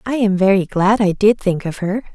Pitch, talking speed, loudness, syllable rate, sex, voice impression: 200 Hz, 250 wpm, -16 LUFS, 5.2 syllables/s, female, feminine, adult-like, slightly relaxed, powerful, bright, soft, clear, slightly raspy, intellectual, friendly, reassuring, elegant, kind, modest